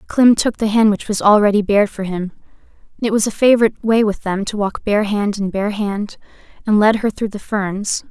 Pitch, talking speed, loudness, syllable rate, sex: 210 Hz, 205 wpm, -16 LUFS, 5.3 syllables/s, female